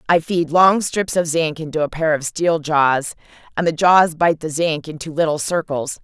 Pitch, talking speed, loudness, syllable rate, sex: 160 Hz, 210 wpm, -18 LUFS, 4.6 syllables/s, female